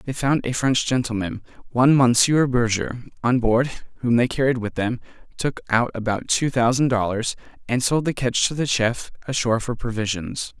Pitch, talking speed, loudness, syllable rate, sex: 120 Hz, 175 wpm, -21 LUFS, 5.1 syllables/s, male